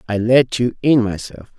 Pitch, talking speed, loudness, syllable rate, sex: 115 Hz, 190 wpm, -16 LUFS, 4.6 syllables/s, male